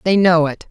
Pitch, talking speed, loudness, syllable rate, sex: 170 Hz, 255 wpm, -14 LUFS, 5.0 syllables/s, female